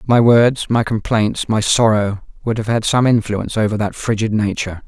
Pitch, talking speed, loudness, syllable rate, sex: 110 Hz, 185 wpm, -16 LUFS, 5.1 syllables/s, male